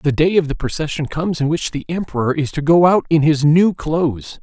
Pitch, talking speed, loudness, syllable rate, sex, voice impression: 155 Hz, 245 wpm, -17 LUFS, 5.5 syllables/s, male, masculine, adult-like, tensed, slightly powerful, slightly hard, raspy, intellectual, calm, friendly, reassuring, wild, lively, slightly kind